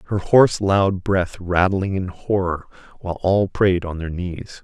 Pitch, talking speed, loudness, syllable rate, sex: 95 Hz, 170 wpm, -20 LUFS, 4.2 syllables/s, male